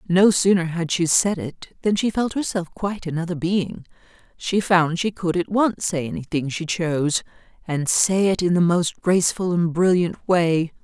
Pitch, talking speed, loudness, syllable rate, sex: 175 Hz, 185 wpm, -21 LUFS, 4.6 syllables/s, female